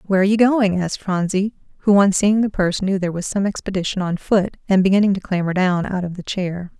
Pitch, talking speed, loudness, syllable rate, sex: 190 Hz, 230 wpm, -19 LUFS, 6.0 syllables/s, female